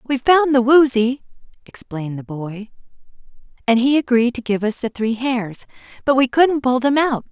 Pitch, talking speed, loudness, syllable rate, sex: 245 Hz, 180 wpm, -17 LUFS, 4.8 syllables/s, female